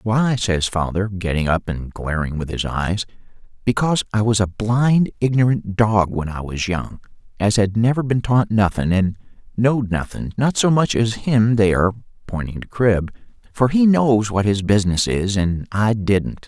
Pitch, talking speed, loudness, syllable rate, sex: 105 Hz, 180 wpm, -19 LUFS, 4.5 syllables/s, male